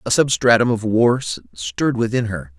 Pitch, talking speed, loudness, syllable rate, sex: 110 Hz, 165 wpm, -18 LUFS, 5.5 syllables/s, male